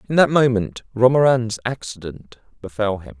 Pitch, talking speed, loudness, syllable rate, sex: 115 Hz, 130 wpm, -19 LUFS, 4.9 syllables/s, male